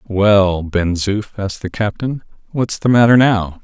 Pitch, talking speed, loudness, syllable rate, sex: 105 Hz, 165 wpm, -15 LUFS, 4.2 syllables/s, male